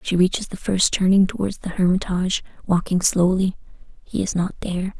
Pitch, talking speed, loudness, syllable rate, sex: 185 Hz, 155 wpm, -21 LUFS, 5.6 syllables/s, female